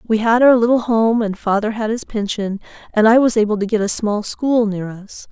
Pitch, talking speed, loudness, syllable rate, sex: 220 Hz, 235 wpm, -17 LUFS, 5.1 syllables/s, female